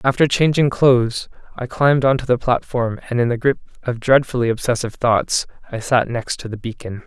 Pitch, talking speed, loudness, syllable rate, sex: 125 Hz, 185 wpm, -18 LUFS, 5.6 syllables/s, male